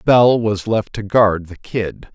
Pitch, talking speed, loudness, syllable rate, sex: 105 Hz, 195 wpm, -17 LUFS, 3.5 syllables/s, male